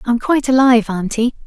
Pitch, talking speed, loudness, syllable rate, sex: 240 Hz, 205 wpm, -15 LUFS, 7.1 syllables/s, female